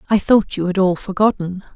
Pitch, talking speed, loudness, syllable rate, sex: 190 Hz, 205 wpm, -17 LUFS, 5.5 syllables/s, female